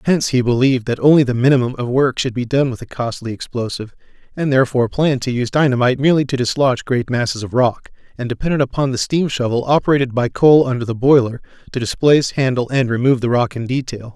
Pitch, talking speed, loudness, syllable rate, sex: 130 Hz, 210 wpm, -17 LUFS, 6.8 syllables/s, male